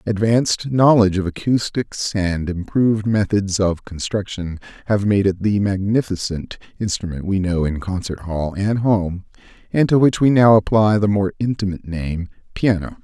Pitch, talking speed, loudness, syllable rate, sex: 100 Hz, 150 wpm, -19 LUFS, 4.7 syllables/s, male